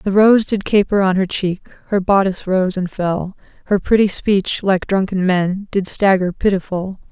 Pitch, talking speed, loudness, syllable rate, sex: 190 Hz, 175 wpm, -17 LUFS, 4.5 syllables/s, female